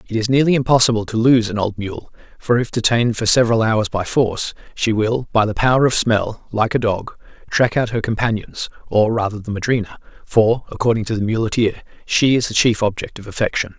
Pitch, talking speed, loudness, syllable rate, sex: 115 Hz, 205 wpm, -18 LUFS, 5.7 syllables/s, male